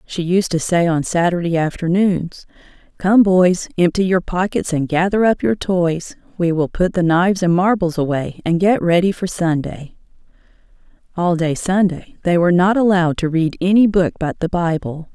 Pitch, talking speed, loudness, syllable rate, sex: 175 Hz, 175 wpm, -17 LUFS, 4.9 syllables/s, female